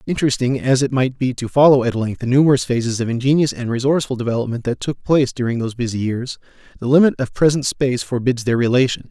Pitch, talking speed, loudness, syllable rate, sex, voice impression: 125 Hz, 210 wpm, -18 LUFS, 6.7 syllables/s, male, masculine, adult-like, slightly powerful, clear, fluent, intellectual, slightly mature, wild, slightly lively, strict, slightly sharp